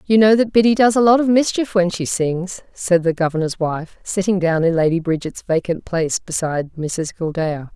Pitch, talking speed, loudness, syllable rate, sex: 180 Hz, 200 wpm, -18 LUFS, 5.1 syllables/s, female